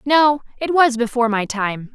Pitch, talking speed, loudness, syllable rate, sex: 250 Hz, 185 wpm, -18 LUFS, 4.7 syllables/s, female